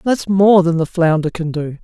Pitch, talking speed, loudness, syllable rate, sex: 175 Hz, 230 wpm, -15 LUFS, 4.7 syllables/s, male